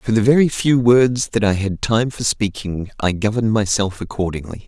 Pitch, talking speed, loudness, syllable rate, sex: 110 Hz, 195 wpm, -18 LUFS, 5.1 syllables/s, male